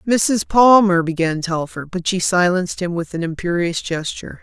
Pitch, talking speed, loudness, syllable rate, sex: 180 Hz, 165 wpm, -18 LUFS, 5.0 syllables/s, female